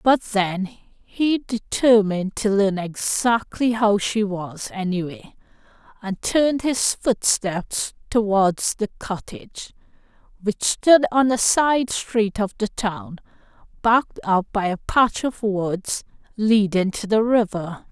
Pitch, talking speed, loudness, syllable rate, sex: 210 Hz, 125 wpm, -21 LUFS, 3.6 syllables/s, female